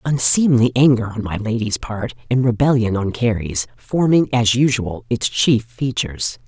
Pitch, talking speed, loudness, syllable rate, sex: 120 Hz, 150 wpm, -18 LUFS, 4.5 syllables/s, female